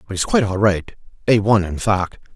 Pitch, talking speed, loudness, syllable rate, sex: 100 Hz, 205 wpm, -18 LUFS, 6.3 syllables/s, male